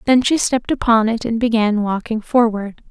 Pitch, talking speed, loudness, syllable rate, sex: 225 Hz, 185 wpm, -17 LUFS, 5.2 syllables/s, female